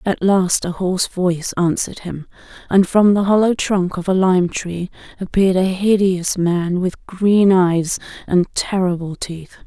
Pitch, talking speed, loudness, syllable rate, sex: 185 Hz, 160 wpm, -17 LUFS, 4.2 syllables/s, female